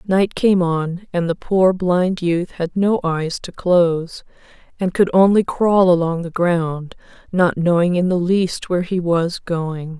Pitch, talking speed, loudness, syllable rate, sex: 175 Hz, 175 wpm, -18 LUFS, 3.8 syllables/s, female